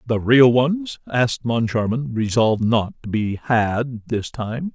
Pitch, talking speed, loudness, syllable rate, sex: 120 Hz, 150 wpm, -20 LUFS, 3.9 syllables/s, male